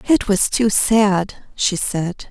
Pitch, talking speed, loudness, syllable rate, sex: 205 Hz, 155 wpm, -17 LUFS, 3.0 syllables/s, female